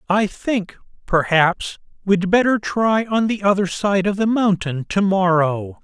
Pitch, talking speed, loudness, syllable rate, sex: 195 Hz, 155 wpm, -18 LUFS, 3.9 syllables/s, male